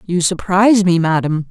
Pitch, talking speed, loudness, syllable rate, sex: 180 Hz, 160 wpm, -14 LUFS, 5.0 syllables/s, female